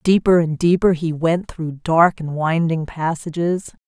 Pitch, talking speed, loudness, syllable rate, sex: 165 Hz, 155 wpm, -19 LUFS, 4.1 syllables/s, female